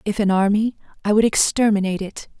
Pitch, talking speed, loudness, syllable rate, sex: 205 Hz, 175 wpm, -19 LUFS, 6.2 syllables/s, female